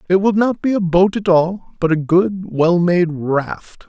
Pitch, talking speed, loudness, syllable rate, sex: 180 Hz, 215 wpm, -16 LUFS, 3.9 syllables/s, male